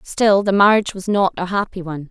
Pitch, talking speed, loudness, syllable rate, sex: 190 Hz, 230 wpm, -17 LUFS, 6.1 syllables/s, female